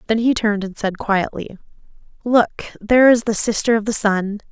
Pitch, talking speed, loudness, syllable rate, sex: 215 Hz, 185 wpm, -17 LUFS, 5.6 syllables/s, female